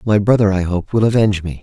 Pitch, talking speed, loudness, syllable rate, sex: 100 Hz, 260 wpm, -15 LUFS, 6.6 syllables/s, male